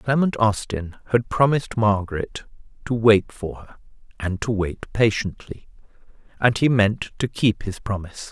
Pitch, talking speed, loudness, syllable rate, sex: 110 Hz, 145 wpm, -22 LUFS, 4.6 syllables/s, male